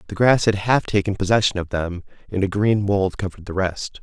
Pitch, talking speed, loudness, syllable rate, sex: 100 Hz, 225 wpm, -21 LUFS, 5.6 syllables/s, male